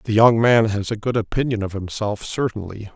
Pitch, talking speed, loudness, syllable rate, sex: 110 Hz, 205 wpm, -20 LUFS, 5.4 syllables/s, male